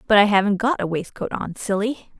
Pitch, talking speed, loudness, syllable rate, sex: 205 Hz, 220 wpm, -21 LUFS, 5.5 syllables/s, female